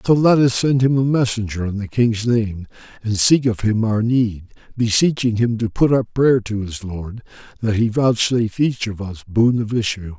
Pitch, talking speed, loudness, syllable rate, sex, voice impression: 115 Hz, 205 wpm, -18 LUFS, 4.8 syllables/s, male, very masculine, very adult-like, very old, very thick, very relaxed, powerful, dark, very soft, very muffled, slightly fluent, raspy, cool, intellectual, very sincere, very calm, very mature, friendly, reassuring, very unique, slightly elegant, very wild, slightly sweet, slightly strict, slightly intense, very modest